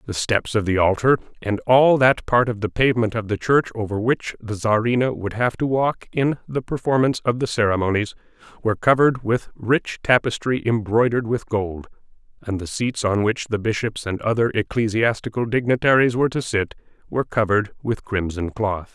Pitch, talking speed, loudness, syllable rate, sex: 115 Hz, 175 wpm, -21 LUFS, 5.4 syllables/s, male